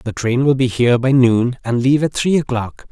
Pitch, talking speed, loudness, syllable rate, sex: 125 Hz, 245 wpm, -16 LUFS, 5.6 syllables/s, male